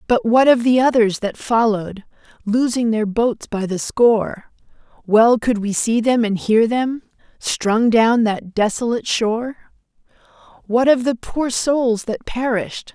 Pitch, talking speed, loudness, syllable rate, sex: 230 Hz, 155 wpm, -18 LUFS, 4.2 syllables/s, female